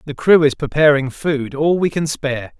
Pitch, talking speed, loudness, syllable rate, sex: 145 Hz, 210 wpm, -16 LUFS, 4.9 syllables/s, male